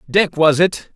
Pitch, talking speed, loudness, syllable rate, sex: 165 Hz, 190 wpm, -15 LUFS, 3.9 syllables/s, male